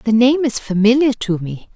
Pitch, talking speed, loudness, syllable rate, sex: 230 Hz, 205 wpm, -16 LUFS, 4.8 syllables/s, female